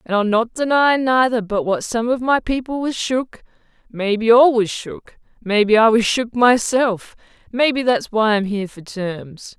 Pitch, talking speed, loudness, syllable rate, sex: 230 Hz, 175 wpm, -17 LUFS, 4.4 syllables/s, female